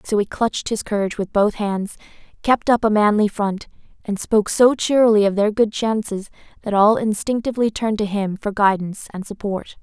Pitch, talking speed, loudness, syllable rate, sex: 210 Hz, 190 wpm, -19 LUFS, 5.5 syllables/s, female